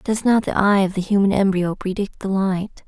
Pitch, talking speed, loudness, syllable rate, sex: 195 Hz, 230 wpm, -19 LUFS, 5.0 syllables/s, female